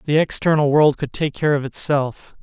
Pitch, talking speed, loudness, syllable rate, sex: 145 Hz, 200 wpm, -18 LUFS, 4.9 syllables/s, male